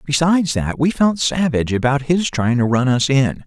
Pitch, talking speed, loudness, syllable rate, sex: 140 Hz, 210 wpm, -17 LUFS, 5.1 syllables/s, male